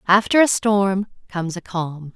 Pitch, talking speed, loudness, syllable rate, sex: 195 Hz, 165 wpm, -20 LUFS, 4.6 syllables/s, female